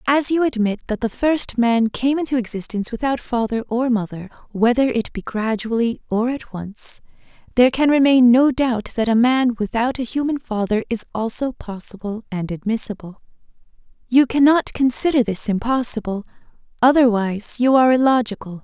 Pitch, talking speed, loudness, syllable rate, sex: 240 Hz, 145 wpm, -19 LUFS, 5.2 syllables/s, female